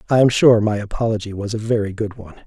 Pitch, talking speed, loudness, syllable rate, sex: 110 Hz, 245 wpm, -18 LUFS, 6.9 syllables/s, male